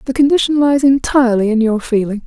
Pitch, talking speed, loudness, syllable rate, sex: 250 Hz, 185 wpm, -13 LUFS, 6.1 syllables/s, female